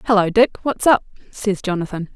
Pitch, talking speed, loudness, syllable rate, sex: 205 Hz, 165 wpm, -18 LUFS, 5.3 syllables/s, female